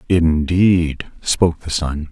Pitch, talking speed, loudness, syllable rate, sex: 80 Hz, 115 wpm, -17 LUFS, 3.3 syllables/s, male